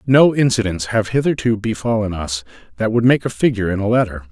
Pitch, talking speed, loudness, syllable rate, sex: 110 Hz, 195 wpm, -17 LUFS, 6.0 syllables/s, male